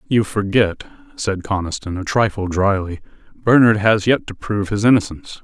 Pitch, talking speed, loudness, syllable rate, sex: 100 Hz, 155 wpm, -18 LUFS, 5.1 syllables/s, male